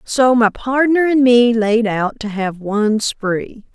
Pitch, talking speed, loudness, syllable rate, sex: 230 Hz, 175 wpm, -15 LUFS, 3.6 syllables/s, female